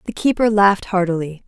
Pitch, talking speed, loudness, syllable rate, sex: 195 Hz, 165 wpm, -17 LUFS, 6.0 syllables/s, female